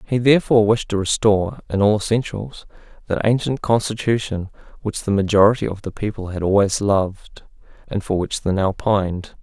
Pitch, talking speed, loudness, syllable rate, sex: 105 Hz, 165 wpm, -19 LUFS, 5.5 syllables/s, male